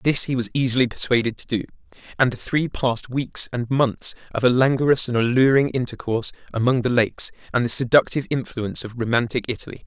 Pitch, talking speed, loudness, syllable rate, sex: 125 Hz, 180 wpm, -21 LUFS, 6.3 syllables/s, male